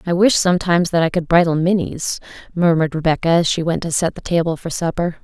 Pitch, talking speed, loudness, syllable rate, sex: 170 Hz, 220 wpm, -17 LUFS, 6.3 syllables/s, female